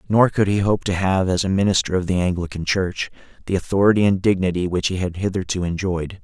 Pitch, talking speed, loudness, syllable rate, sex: 95 Hz, 210 wpm, -20 LUFS, 6.0 syllables/s, male